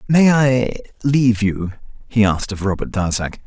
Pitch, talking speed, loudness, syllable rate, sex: 110 Hz, 155 wpm, -18 LUFS, 4.9 syllables/s, male